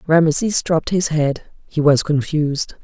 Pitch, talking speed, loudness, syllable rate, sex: 155 Hz, 150 wpm, -18 LUFS, 4.7 syllables/s, female